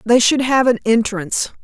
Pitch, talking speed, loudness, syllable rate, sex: 235 Hz, 185 wpm, -16 LUFS, 5.0 syllables/s, female